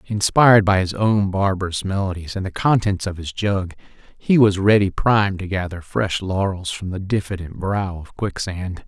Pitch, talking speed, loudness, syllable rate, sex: 95 Hz, 175 wpm, -20 LUFS, 4.8 syllables/s, male